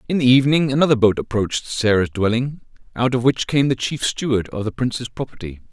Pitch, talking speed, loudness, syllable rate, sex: 120 Hz, 200 wpm, -19 LUFS, 6.1 syllables/s, male